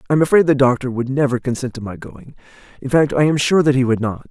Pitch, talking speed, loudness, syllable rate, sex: 135 Hz, 265 wpm, -16 LUFS, 6.6 syllables/s, male